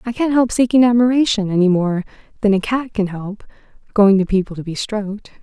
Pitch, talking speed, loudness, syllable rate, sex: 210 Hz, 200 wpm, -17 LUFS, 5.7 syllables/s, female